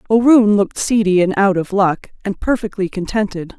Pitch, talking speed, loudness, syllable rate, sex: 200 Hz, 165 wpm, -16 LUFS, 5.3 syllables/s, female